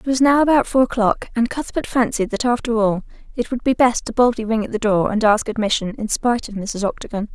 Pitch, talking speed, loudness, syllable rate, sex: 230 Hz, 245 wpm, -19 LUFS, 5.9 syllables/s, female